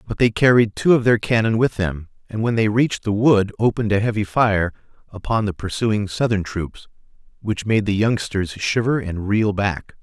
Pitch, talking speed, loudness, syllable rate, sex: 105 Hz, 190 wpm, -19 LUFS, 5.0 syllables/s, male